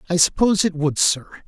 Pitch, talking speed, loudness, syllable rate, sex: 170 Hz, 205 wpm, -19 LUFS, 6.1 syllables/s, male